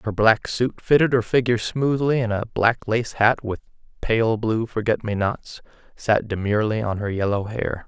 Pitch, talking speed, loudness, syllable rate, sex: 110 Hz, 185 wpm, -22 LUFS, 4.8 syllables/s, male